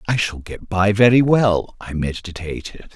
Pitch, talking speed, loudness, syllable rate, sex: 100 Hz, 165 wpm, -18 LUFS, 4.4 syllables/s, male